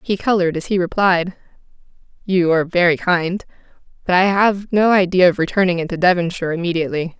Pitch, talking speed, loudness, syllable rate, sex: 180 Hz, 160 wpm, -17 LUFS, 6.2 syllables/s, female